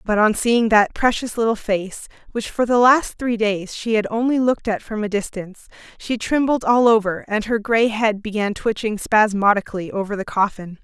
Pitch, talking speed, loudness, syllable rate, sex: 215 Hz, 195 wpm, -19 LUFS, 5.1 syllables/s, female